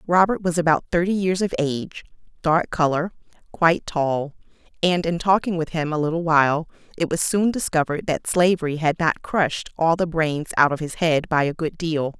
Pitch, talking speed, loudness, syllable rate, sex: 165 Hz, 190 wpm, -21 LUFS, 5.2 syllables/s, female